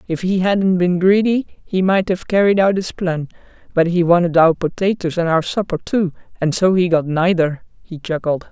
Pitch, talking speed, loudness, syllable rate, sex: 180 Hz, 195 wpm, -17 LUFS, 4.9 syllables/s, female